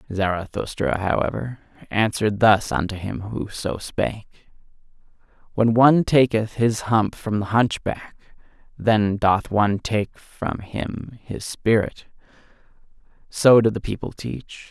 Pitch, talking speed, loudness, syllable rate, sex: 110 Hz, 120 wpm, -21 LUFS, 3.9 syllables/s, male